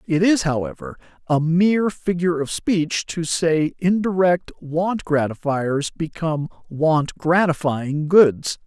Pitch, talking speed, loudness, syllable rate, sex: 165 Hz, 120 wpm, -20 LUFS, 3.9 syllables/s, male